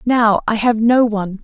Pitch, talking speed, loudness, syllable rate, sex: 225 Hz, 210 wpm, -15 LUFS, 4.8 syllables/s, female